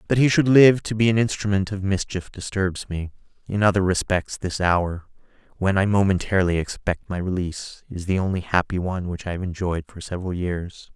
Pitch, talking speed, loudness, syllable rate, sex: 95 Hz, 190 wpm, -22 LUFS, 5.5 syllables/s, male